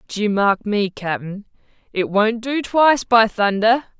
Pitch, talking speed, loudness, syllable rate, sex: 215 Hz, 165 wpm, -18 LUFS, 4.0 syllables/s, female